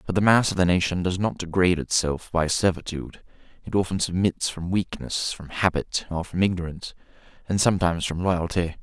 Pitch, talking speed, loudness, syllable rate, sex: 90 Hz, 175 wpm, -24 LUFS, 5.7 syllables/s, male